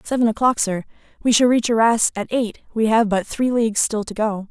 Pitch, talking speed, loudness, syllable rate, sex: 225 Hz, 225 wpm, -19 LUFS, 5.5 syllables/s, female